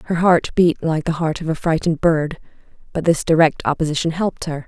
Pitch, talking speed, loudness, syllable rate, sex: 160 Hz, 205 wpm, -18 LUFS, 6.0 syllables/s, female